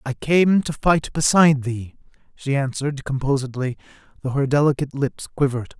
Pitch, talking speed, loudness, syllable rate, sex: 140 Hz, 145 wpm, -20 LUFS, 5.6 syllables/s, male